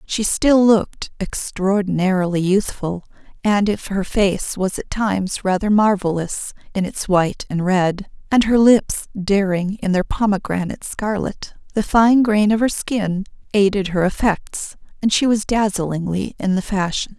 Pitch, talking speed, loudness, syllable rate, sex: 200 Hz, 150 wpm, -19 LUFS, 4.3 syllables/s, female